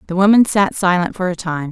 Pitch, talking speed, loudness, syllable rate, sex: 185 Hz, 245 wpm, -15 LUFS, 5.7 syllables/s, female